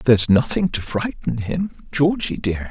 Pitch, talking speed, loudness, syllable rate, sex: 140 Hz, 155 wpm, -20 LUFS, 4.2 syllables/s, male